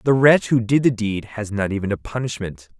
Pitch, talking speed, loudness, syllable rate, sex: 115 Hz, 235 wpm, -20 LUFS, 5.4 syllables/s, male